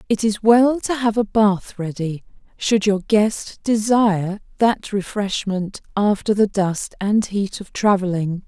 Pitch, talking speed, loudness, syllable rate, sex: 205 Hz, 150 wpm, -19 LUFS, 3.8 syllables/s, female